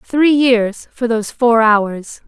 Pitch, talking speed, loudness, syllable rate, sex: 235 Hz, 160 wpm, -14 LUFS, 3.3 syllables/s, female